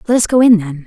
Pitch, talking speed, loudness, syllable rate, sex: 205 Hz, 350 wpm, -12 LUFS, 7.0 syllables/s, female